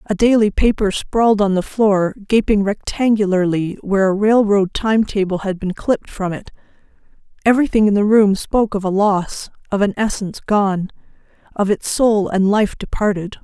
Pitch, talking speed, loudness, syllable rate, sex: 205 Hz, 165 wpm, -17 LUFS, 5.1 syllables/s, female